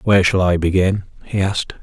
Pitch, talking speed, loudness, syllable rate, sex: 95 Hz, 195 wpm, -17 LUFS, 6.1 syllables/s, male